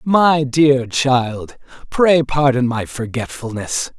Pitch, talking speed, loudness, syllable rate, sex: 135 Hz, 90 wpm, -16 LUFS, 3.1 syllables/s, male